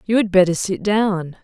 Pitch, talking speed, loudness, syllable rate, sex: 195 Hz, 210 wpm, -18 LUFS, 4.7 syllables/s, female